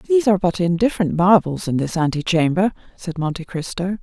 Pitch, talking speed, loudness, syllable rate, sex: 180 Hz, 180 wpm, -19 LUFS, 5.9 syllables/s, female